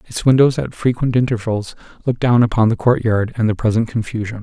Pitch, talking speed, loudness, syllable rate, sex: 115 Hz, 190 wpm, -17 LUFS, 6.1 syllables/s, male